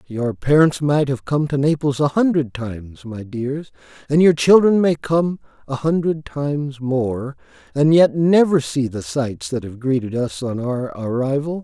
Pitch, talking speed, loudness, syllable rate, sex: 140 Hz, 175 wpm, -19 LUFS, 4.3 syllables/s, male